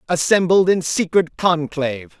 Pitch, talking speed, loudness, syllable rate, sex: 165 Hz, 110 wpm, -17 LUFS, 4.5 syllables/s, male